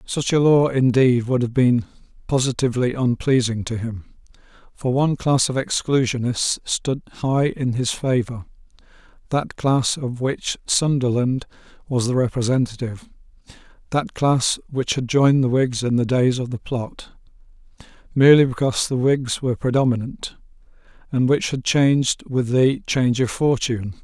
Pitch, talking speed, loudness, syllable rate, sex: 130 Hz, 140 wpm, -20 LUFS, 4.9 syllables/s, male